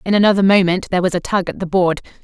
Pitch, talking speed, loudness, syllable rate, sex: 185 Hz, 270 wpm, -16 LUFS, 7.4 syllables/s, female